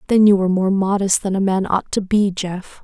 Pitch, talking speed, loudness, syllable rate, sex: 195 Hz, 255 wpm, -18 LUFS, 5.3 syllables/s, female